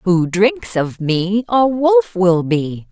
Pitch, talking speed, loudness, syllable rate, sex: 205 Hz, 165 wpm, -16 LUFS, 3.0 syllables/s, female